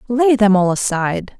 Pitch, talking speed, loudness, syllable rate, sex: 215 Hz, 170 wpm, -15 LUFS, 4.9 syllables/s, female